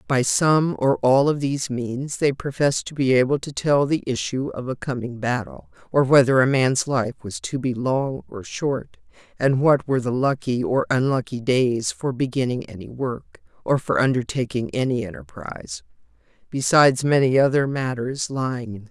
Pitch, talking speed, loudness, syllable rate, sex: 130 Hz, 180 wpm, -21 LUFS, 5.1 syllables/s, female